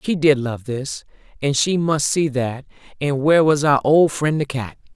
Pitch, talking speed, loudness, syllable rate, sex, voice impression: 145 Hz, 205 wpm, -19 LUFS, 4.6 syllables/s, female, feminine, gender-neutral, slightly thick, tensed, powerful, slightly bright, slightly soft, clear, fluent, slightly cool, intellectual, slightly refreshing, sincere, calm, slightly friendly, slightly reassuring, very unique, elegant, wild, slightly sweet, lively, strict, slightly intense